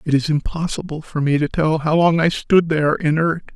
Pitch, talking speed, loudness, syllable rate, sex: 155 Hz, 220 wpm, -18 LUFS, 5.3 syllables/s, male